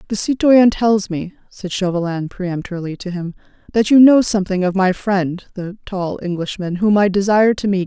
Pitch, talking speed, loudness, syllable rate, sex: 195 Hz, 185 wpm, -17 LUFS, 5.3 syllables/s, female